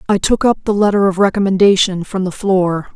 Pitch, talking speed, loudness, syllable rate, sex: 195 Hz, 205 wpm, -14 LUFS, 5.6 syllables/s, female